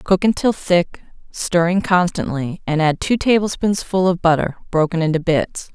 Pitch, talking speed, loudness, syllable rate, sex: 175 Hz, 145 wpm, -18 LUFS, 4.6 syllables/s, female